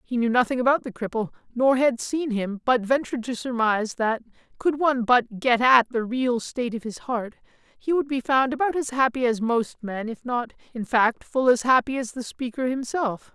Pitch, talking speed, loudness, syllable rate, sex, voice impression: 245 Hz, 210 wpm, -23 LUFS, 5.1 syllables/s, male, gender-neutral, adult-like, fluent, unique, slightly intense